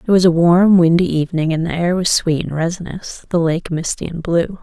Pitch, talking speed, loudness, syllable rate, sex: 170 Hz, 235 wpm, -16 LUFS, 5.3 syllables/s, female